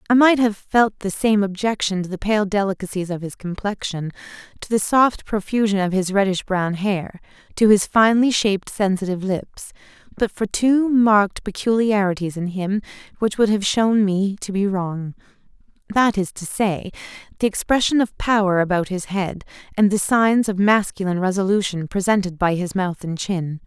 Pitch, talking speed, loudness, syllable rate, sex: 200 Hz, 165 wpm, -20 LUFS, 5.0 syllables/s, female